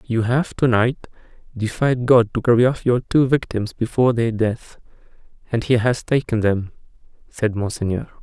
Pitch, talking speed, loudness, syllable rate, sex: 115 Hz, 160 wpm, -19 LUFS, 4.9 syllables/s, male